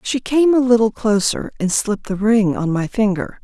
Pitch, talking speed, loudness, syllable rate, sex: 215 Hz, 210 wpm, -17 LUFS, 4.9 syllables/s, female